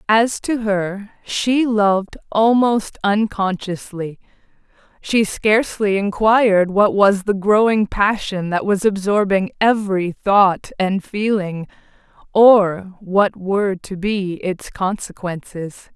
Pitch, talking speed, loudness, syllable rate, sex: 200 Hz, 110 wpm, -17 LUFS, 3.6 syllables/s, female